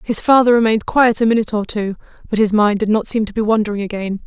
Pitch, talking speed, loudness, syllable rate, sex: 215 Hz, 255 wpm, -16 LUFS, 6.8 syllables/s, female